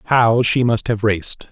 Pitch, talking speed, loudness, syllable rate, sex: 115 Hz, 200 wpm, -17 LUFS, 4.6 syllables/s, male